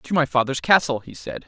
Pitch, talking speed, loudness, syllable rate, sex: 145 Hz, 245 wpm, -20 LUFS, 5.6 syllables/s, male